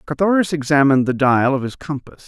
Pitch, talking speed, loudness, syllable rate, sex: 145 Hz, 185 wpm, -17 LUFS, 6.1 syllables/s, male